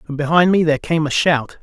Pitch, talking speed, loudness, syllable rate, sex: 155 Hz, 260 wpm, -16 LUFS, 6.1 syllables/s, male